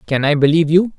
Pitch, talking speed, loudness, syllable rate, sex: 160 Hz, 245 wpm, -14 LUFS, 7.3 syllables/s, male